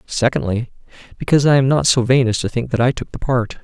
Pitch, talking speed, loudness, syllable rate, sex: 125 Hz, 245 wpm, -17 LUFS, 6.3 syllables/s, male